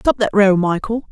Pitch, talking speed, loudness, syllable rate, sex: 210 Hz, 215 wpm, -16 LUFS, 4.9 syllables/s, female